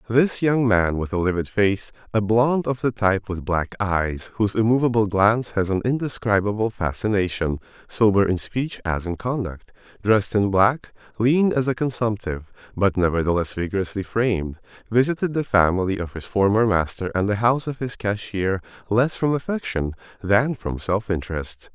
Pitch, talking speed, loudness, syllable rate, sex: 105 Hz, 155 wpm, -22 LUFS, 5.2 syllables/s, male